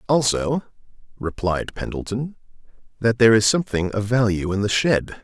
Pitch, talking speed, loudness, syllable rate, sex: 110 Hz, 140 wpm, -21 LUFS, 5.2 syllables/s, male